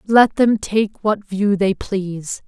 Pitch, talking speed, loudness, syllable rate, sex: 205 Hz, 170 wpm, -18 LUFS, 3.5 syllables/s, female